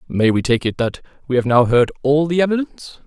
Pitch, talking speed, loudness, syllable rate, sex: 140 Hz, 235 wpm, -17 LUFS, 6.1 syllables/s, male